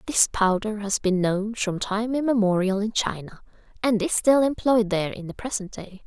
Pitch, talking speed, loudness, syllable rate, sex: 210 Hz, 190 wpm, -23 LUFS, 4.9 syllables/s, female